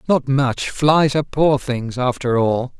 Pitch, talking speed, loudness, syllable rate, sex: 135 Hz, 170 wpm, -18 LUFS, 3.9 syllables/s, male